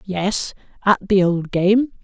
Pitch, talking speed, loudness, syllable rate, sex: 195 Hz, 150 wpm, -18 LUFS, 3.2 syllables/s, female